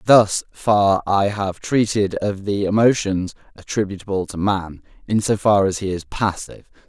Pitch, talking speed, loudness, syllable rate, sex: 100 Hz, 155 wpm, -19 LUFS, 4.5 syllables/s, male